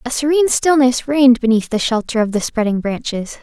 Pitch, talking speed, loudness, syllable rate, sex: 245 Hz, 195 wpm, -15 LUFS, 5.7 syllables/s, female